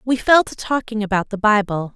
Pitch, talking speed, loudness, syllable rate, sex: 220 Hz, 215 wpm, -18 LUFS, 5.4 syllables/s, female